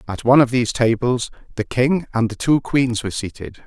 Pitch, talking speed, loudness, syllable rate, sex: 120 Hz, 215 wpm, -19 LUFS, 5.7 syllables/s, male